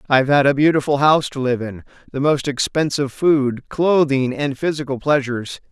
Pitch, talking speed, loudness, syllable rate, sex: 140 Hz, 180 wpm, -18 LUFS, 5.4 syllables/s, male